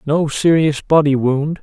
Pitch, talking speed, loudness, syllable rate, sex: 150 Hz, 150 wpm, -15 LUFS, 4.0 syllables/s, male